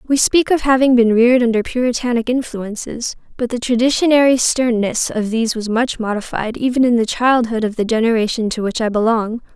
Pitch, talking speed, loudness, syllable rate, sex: 235 Hz, 180 wpm, -16 LUFS, 5.6 syllables/s, female